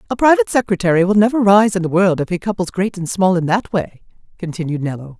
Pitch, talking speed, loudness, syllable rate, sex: 185 Hz, 230 wpm, -16 LUFS, 6.4 syllables/s, female